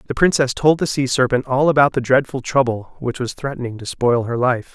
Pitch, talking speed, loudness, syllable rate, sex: 130 Hz, 230 wpm, -18 LUFS, 5.5 syllables/s, male